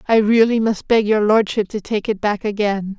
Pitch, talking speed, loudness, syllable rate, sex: 210 Hz, 220 wpm, -17 LUFS, 5.0 syllables/s, female